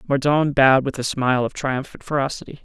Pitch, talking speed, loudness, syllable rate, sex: 135 Hz, 180 wpm, -20 LUFS, 6.1 syllables/s, male